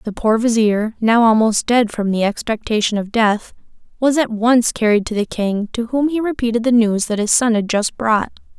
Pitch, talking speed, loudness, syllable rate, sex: 225 Hz, 210 wpm, -17 LUFS, 4.9 syllables/s, female